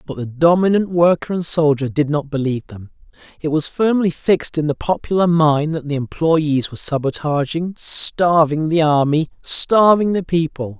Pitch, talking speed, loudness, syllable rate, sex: 155 Hz, 160 wpm, -17 LUFS, 4.8 syllables/s, male